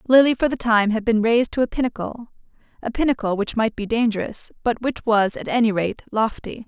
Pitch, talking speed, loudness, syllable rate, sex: 230 Hz, 200 wpm, -21 LUFS, 5.5 syllables/s, female